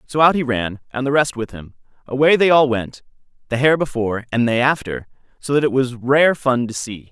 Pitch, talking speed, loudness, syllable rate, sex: 130 Hz, 220 wpm, -18 LUFS, 5.4 syllables/s, male